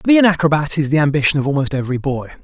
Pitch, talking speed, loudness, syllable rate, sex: 150 Hz, 270 wpm, -16 LUFS, 7.9 syllables/s, male